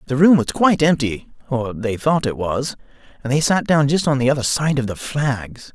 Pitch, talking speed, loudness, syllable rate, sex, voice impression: 135 Hz, 230 wpm, -18 LUFS, 5.2 syllables/s, male, masculine, adult-like, fluent, refreshing, slightly unique